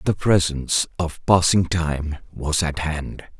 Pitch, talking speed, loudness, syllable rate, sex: 80 Hz, 140 wpm, -21 LUFS, 3.8 syllables/s, male